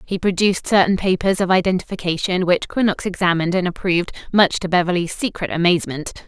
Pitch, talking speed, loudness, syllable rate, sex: 180 Hz, 155 wpm, -19 LUFS, 6.2 syllables/s, female